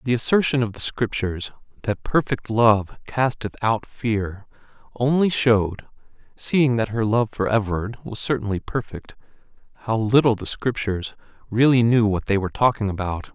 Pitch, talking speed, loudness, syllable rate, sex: 110 Hz, 150 wpm, -22 LUFS, 4.9 syllables/s, male